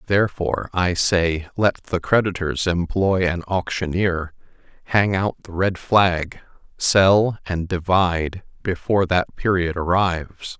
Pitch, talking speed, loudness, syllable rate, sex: 90 Hz, 120 wpm, -20 LUFS, 4.0 syllables/s, male